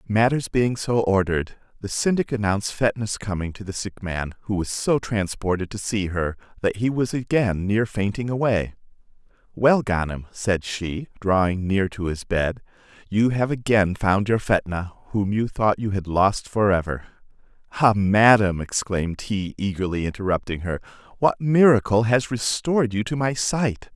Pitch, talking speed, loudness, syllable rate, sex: 105 Hz, 165 wpm, -22 LUFS, 4.7 syllables/s, male